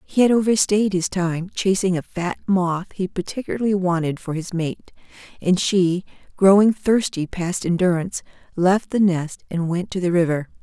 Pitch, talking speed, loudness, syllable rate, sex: 185 Hz, 165 wpm, -20 LUFS, 4.8 syllables/s, female